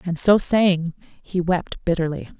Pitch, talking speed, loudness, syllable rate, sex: 175 Hz, 150 wpm, -20 LUFS, 3.8 syllables/s, female